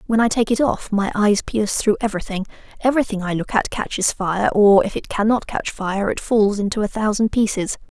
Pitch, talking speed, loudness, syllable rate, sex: 210 Hz, 210 wpm, -19 LUFS, 5.6 syllables/s, female